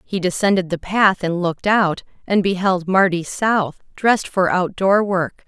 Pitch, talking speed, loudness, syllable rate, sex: 185 Hz, 175 wpm, -18 LUFS, 4.4 syllables/s, female